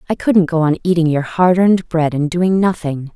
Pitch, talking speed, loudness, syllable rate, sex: 170 Hz, 230 wpm, -15 LUFS, 5.2 syllables/s, female